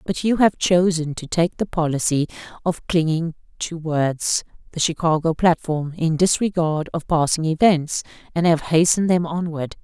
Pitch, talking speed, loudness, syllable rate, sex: 165 Hz, 155 wpm, -20 LUFS, 4.3 syllables/s, female